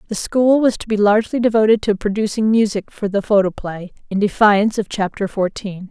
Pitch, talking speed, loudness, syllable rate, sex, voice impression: 210 Hz, 185 wpm, -17 LUFS, 5.6 syllables/s, female, very feminine, slightly young, adult-like, thin, slightly relaxed, slightly weak, bright, hard, very clear, very fluent, cute, very intellectual, very refreshing, sincere, very calm, very friendly, very reassuring, slightly unique, very elegant, slightly wild, very sweet, very kind, modest, light